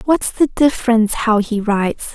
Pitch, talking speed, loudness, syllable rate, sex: 230 Hz, 170 wpm, -16 LUFS, 5.0 syllables/s, female